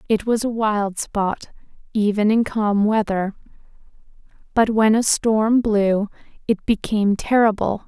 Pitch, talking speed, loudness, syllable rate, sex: 215 Hz, 130 wpm, -19 LUFS, 4.1 syllables/s, female